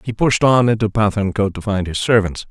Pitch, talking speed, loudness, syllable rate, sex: 105 Hz, 215 wpm, -17 LUFS, 5.8 syllables/s, male